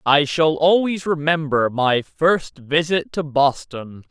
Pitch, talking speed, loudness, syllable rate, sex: 150 Hz, 130 wpm, -19 LUFS, 3.5 syllables/s, male